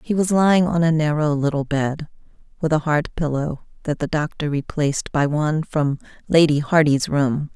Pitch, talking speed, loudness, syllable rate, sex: 150 Hz, 175 wpm, -20 LUFS, 5.0 syllables/s, female